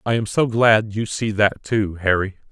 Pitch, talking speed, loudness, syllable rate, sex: 105 Hz, 215 wpm, -19 LUFS, 4.5 syllables/s, male